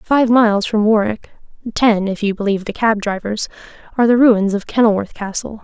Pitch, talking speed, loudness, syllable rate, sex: 215 Hz, 180 wpm, -16 LUFS, 4.0 syllables/s, female